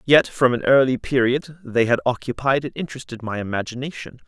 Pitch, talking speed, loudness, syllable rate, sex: 130 Hz, 170 wpm, -21 LUFS, 5.8 syllables/s, male